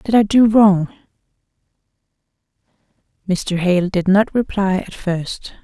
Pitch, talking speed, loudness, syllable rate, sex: 195 Hz, 115 wpm, -16 LUFS, 3.7 syllables/s, female